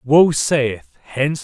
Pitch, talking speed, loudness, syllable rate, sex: 135 Hz, 125 wpm, -17 LUFS, 3.3 syllables/s, male